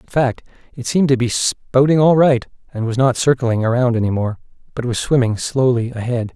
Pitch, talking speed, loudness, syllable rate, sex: 125 Hz, 200 wpm, -17 LUFS, 5.3 syllables/s, male